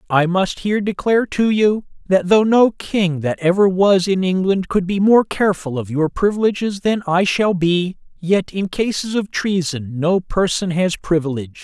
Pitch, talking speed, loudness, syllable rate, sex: 185 Hz, 180 wpm, -17 LUFS, 4.6 syllables/s, male